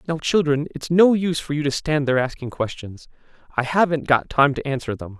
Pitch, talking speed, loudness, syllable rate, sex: 145 Hz, 220 wpm, -21 LUFS, 5.8 syllables/s, male